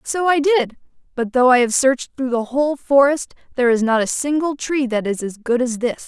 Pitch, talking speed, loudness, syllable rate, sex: 260 Hz, 235 wpm, -18 LUFS, 5.4 syllables/s, female